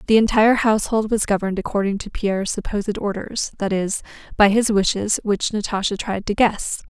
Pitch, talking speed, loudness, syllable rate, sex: 205 Hz, 175 wpm, -20 LUFS, 5.7 syllables/s, female